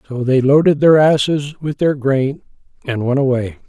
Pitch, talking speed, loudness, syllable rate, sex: 140 Hz, 180 wpm, -15 LUFS, 4.7 syllables/s, male